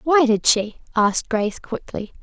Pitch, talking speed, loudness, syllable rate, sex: 235 Hz, 160 wpm, -20 LUFS, 4.8 syllables/s, female